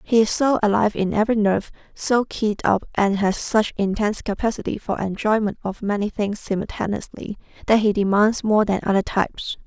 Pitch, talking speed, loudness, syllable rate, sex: 210 Hz, 175 wpm, -21 LUFS, 5.5 syllables/s, female